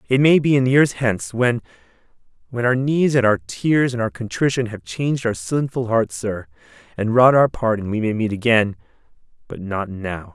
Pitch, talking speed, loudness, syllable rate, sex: 115 Hz, 180 wpm, -19 LUFS, 5.0 syllables/s, male